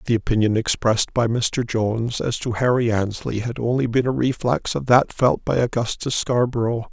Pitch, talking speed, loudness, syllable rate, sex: 115 Hz, 180 wpm, -21 LUFS, 5.2 syllables/s, male